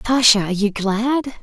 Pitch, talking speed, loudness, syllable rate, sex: 225 Hz, 125 wpm, -17 LUFS, 6.0 syllables/s, female